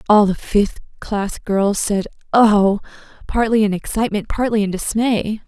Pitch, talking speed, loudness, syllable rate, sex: 210 Hz, 140 wpm, -18 LUFS, 4.4 syllables/s, female